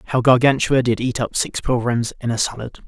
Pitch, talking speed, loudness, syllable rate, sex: 120 Hz, 210 wpm, -19 LUFS, 5.7 syllables/s, male